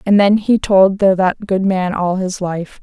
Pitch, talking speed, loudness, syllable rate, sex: 190 Hz, 235 wpm, -15 LUFS, 4.6 syllables/s, female